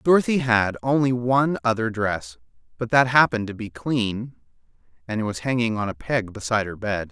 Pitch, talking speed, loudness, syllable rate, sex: 115 Hz, 175 wpm, -22 LUFS, 5.3 syllables/s, male